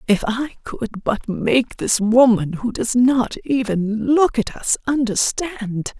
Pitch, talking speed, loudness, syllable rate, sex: 235 Hz, 150 wpm, -19 LUFS, 3.4 syllables/s, female